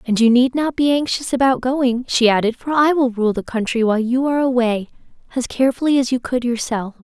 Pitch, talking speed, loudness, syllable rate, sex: 250 Hz, 220 wpm, -18 LUFS, 5.8 syllables/s, female